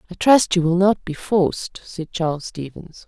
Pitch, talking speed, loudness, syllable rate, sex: 175 Hz, 195 wpm, -19 LUFS, 4.6 syllables/s, female